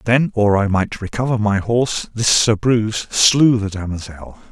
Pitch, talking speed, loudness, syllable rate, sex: 110 Hz, 185 wpm, -17 LUFS, 4.7 syllables/s, male